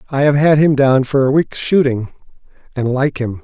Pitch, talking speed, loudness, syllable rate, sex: 135 Hz, 210 wpm, -14 LUFS, 5.1 syllables/s, male